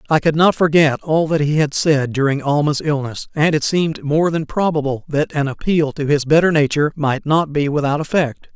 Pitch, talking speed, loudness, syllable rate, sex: 150 Hz, 210 wpm, -17 LUFS, 5.3 syllables/s, male